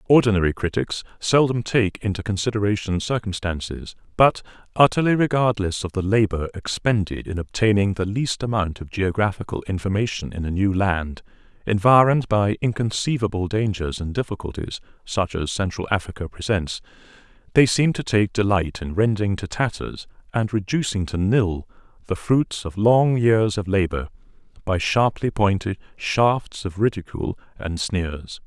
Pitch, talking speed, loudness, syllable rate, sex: 100 Hz, 135 wpm, -22 LUFS, 4.9 syllables/s, male